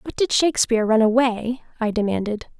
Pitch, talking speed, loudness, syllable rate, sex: 230 Hz, 160 wpm, -20 LUFS, 5.7 syllables/s, female